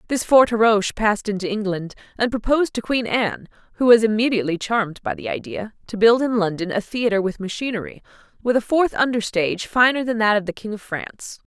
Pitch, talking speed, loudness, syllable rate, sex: 220 Hz, 200 wpm, -20 LUFS, 6.1 syllables/s, female